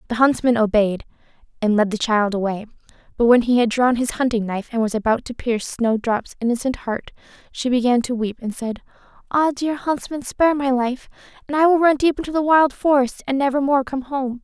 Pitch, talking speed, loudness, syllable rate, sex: 250 Hz, 210 wpm, -20 LUFS, 5.6 syllables/s, female